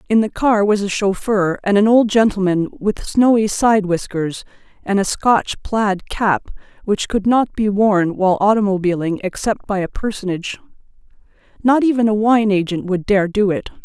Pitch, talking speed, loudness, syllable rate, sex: 205 Hz, 170 wpm, -17 LUFS, 4.8 syllables/s, female